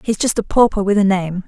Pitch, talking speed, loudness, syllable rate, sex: 200 Hz, 285 wpm, -16 LUFS, 5.8 syllables/s, female